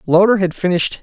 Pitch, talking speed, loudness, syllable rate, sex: 185 Hz, 175 wpm, -15 LUFS, 6.6 syllables/s, male